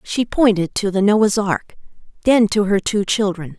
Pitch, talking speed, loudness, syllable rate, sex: 205 Hz, 185 wpm, -17 LUFS, 4.3 syllables/s, female